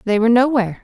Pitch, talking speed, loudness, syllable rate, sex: 230 Hz, 215 wpm, -15 LUFS, 8.5 syllables/s, female